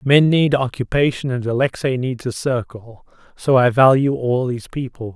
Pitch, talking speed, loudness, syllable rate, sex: 130 Hz, 165 wpm, -18 LUFS, 4.9 syllables/s, male